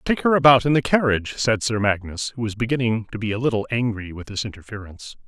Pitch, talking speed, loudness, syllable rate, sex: 115 Hz, 225 wpm, -21 LUFS, 6.4 syllables/s, male